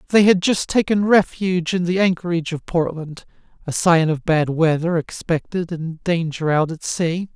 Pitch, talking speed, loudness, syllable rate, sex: 170 Hz, 165 wpm, -19 LUFS, 4.8 syllables/s, male